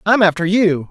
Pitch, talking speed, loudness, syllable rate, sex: 190 Hz, 200 wpm, -15 LUFS, 5.1 syllables/s, male